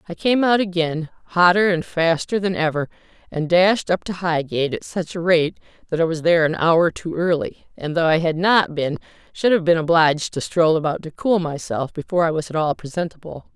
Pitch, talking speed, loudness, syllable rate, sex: 170 Hz, 210 wpm, -20 LUFS, 5.4 syllables/s, female